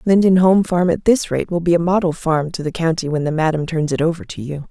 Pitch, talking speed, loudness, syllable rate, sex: 165 Hz, 270 wpm, -17 LUFS, 5.9 syllables/s, female